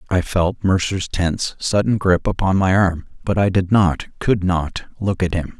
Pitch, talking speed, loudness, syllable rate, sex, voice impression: 95 Hz, 195 wpm, -19 LUFS, 4.4 syllables/s, male, very masculine, middle-aged, very thick, very tensed, very powerful, dark, hard, very muffled, fluent, raspy, very cool, intellectual, slightly refreshing, slightly sincere, very calm, very mature, friendly, very reassuring, very unique, elegant, very wild, sweet, lively, slightly kind, modest